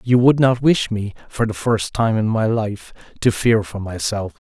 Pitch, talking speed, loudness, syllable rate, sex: 110 Hz, 215 wpm, -19 LUFS, 4.4 syllables/s, male